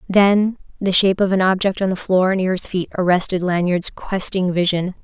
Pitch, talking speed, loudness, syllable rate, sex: 185 Hz, 190 wpm, -18 LUFS, 5.0 syllables/s, female